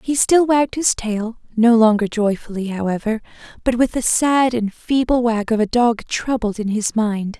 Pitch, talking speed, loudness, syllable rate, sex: 230 Hz, 180 wpm, -18 LUFS, 4.7 syllables/s, female